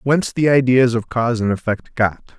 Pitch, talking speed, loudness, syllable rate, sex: 120 Hz, 200 wpm, -17 LUFS, 5.2 syllables/s, male